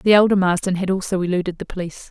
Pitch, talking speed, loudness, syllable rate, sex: 185 Hz, 230 wpm, -20 LUFS, 7.3 syllables/s, female